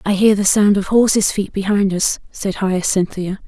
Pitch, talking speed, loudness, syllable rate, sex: 200 Hz, 190 wpm, -16 LUFS, 4.6 syllables/s, female